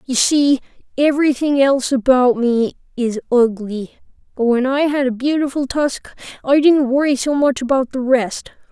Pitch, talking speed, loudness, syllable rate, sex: 265 Hz, 160 wpm, -16 LUFS, 4.7 syllables/s, female